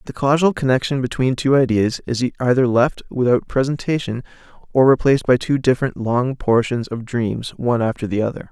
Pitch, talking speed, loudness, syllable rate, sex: 125 Hz, 170 wpm, -18 LUFS, 5.5 syllables/s, male